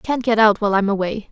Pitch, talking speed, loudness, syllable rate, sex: 210 Hz, 320 wpm, -17 LUFS, 7.1 syllables/s, female